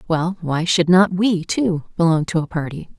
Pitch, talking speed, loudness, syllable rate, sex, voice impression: 170 Hz, 200 wpm, -18 LUFS, 4.6 syllables/s, female, very feminine, slightly middle-aged, thin, slightly tensed, weak, bright, soft, clear, fluent, cute, very intellectual, very refreshing, sincere, calm, very friendly, very reassuring, unique, very elegant, wild, very sweet, lively, very kind, modest, light